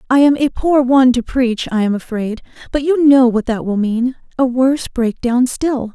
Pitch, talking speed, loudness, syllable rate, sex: 250 Hz, 200 wpm, -15 LUFS, 4.9 syllables/s, female